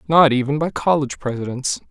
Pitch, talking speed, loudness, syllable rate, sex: 140 Hz, 160 wpm, -19 LUFS, 6.1 syllables/s, male